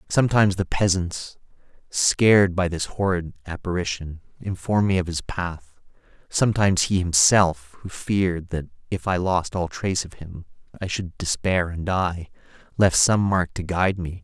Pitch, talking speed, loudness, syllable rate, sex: 90 Hz, 155 wpm, -22 LUFS, 4.8 syllables/s, male